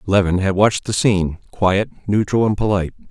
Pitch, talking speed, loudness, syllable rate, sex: 100 Hz, 175 wpm, -18 LUFS, 5.9 syllables/s, male